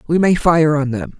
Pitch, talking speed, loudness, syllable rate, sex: 160 Hz, 250 wpm, -15 LUFS, 5.0 syllables/s, female